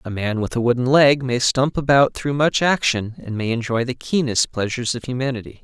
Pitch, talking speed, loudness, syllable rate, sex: 125 Hz, 215 wpm, -19 LUFS, 5.5 syllables/s, male